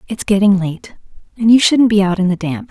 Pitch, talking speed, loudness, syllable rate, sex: 205 Hz, 220 wpm, -14 LUFS, 5.6 syllables/s, female